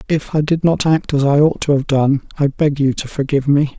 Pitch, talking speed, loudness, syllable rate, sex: 145 Hz, 270 wpm, -16 LUFS, 5.5 syllables/s, male